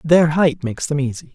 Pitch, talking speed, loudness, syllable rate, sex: 150 Hz, 225 wpm, -18 LUFS, 5.6 syllables/s, male